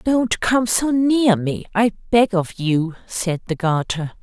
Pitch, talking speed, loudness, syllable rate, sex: 200 Hz, 170 wpm, -19 LUFS, 3.5 syllables/s, female